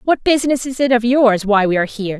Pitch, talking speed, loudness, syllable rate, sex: 235 Hz, 275 wpm, -15 LUFS, 6.6 syllables/s, female